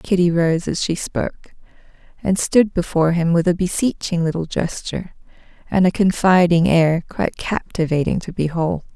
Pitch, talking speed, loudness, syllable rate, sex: 175 Hz, 145 wpm, -19 LUFS, 5.1 syllables/s, female